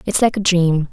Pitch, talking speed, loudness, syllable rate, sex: 185 Hz, 260 wpm, -16 LUFS, 5.1 syllables/s, female